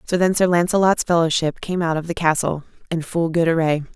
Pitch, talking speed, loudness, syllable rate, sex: 165 Hz, 215 wpm, -19 LUFS, 5.9 syllables/s, female